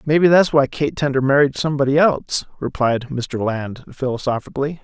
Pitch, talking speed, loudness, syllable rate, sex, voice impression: 135 Hz, 150 wpm, -18 LUFS, 5.5 syllables/s, male, masculine, middle-aged, thin, clear, fluent, sincere, slightly calm, slightly mature, friendly, reassuring, unique, slightly wild, slightly kind